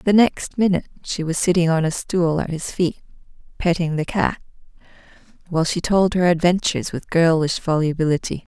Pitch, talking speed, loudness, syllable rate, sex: 170 Hz, 170 wpm, -20 LUFS, 5.6 syllables/s, female